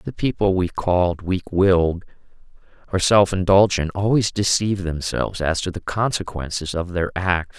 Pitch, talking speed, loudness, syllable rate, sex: 90 Hz, 150 wpm, -20 LUFS, 4.8 syllables/s, male